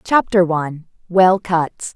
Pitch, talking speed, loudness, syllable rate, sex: 180 Hz, 90 wpm, -16 LUFS, 3.7 syllables/s, female